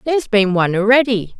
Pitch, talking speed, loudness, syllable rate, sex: 225 Hz, 170 wpm, -15 LUFS, 6.5 syllables/s, female